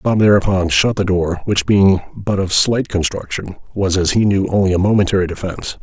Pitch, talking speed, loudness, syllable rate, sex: 95 Hz, 195 wpm, -16 LUFS, 5.4 syllables/s, male